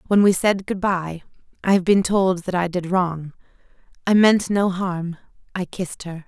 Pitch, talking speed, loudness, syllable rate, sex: 185 Hz, 170 wpm, -20 LUFS, 4.6 syllables/s, female